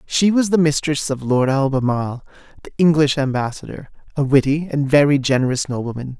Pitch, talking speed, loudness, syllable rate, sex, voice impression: 140 Hz, 155 wpm, -18 LUFS, 5.7 syllables/s, male, masculine, adult-like, slightly tensed, slightly powerful, bright, soft, slightly muffled, intellectual, calm, slightly friendly, wild, lively